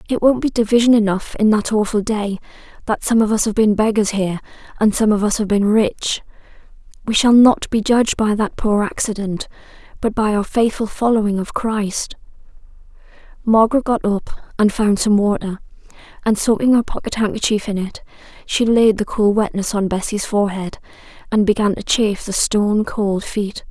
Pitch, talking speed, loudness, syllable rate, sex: 215 Hz, 175 wpm, -17 LUFS, 5.2 syllables/s, female